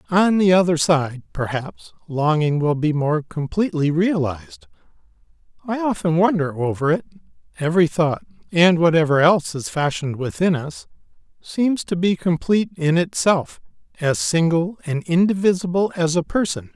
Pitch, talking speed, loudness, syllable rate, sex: 165 Hz, 135 wpm, -20 LUFS, 4.9 syllables/s, male